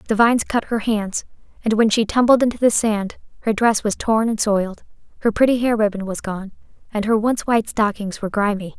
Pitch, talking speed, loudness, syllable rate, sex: 215 Hz, 210 wpm, -19 LUFS, 5.6 syllables/s, female